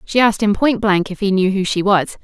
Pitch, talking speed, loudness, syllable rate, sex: 200 Hz, 295 wpm, -16 LUFS, 5.7 syllables/s, female